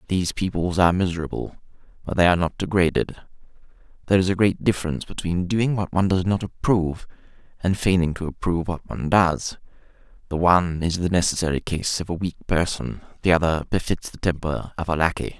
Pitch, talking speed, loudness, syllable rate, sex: 90 Hz, 180 wpm, -23 LUFS, 6.2 syllables/s, male